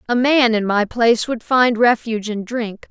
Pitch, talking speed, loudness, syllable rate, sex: 230 Hz, 205 wpm, -17 LUFS, 4.8 syllables/s, female